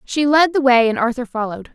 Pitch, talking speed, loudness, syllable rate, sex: 255 Hz, 240 wpm, -16 LUFS, 6.1 syllables/s, female